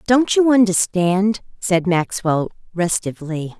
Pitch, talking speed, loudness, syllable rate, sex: 190 Hz, 100 wpm, -18 LUFS, 3.9 syllables/s, female